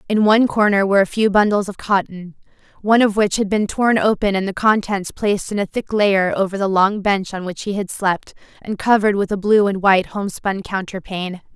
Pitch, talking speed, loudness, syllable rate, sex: 200 Hz, 220 wpm, -18 LUFS, 5.7 syllables/s, female